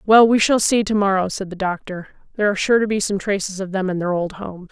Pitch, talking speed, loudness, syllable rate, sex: 195 Hz, 280 wpm, -19 LUFS, 6.5 syllables/s, female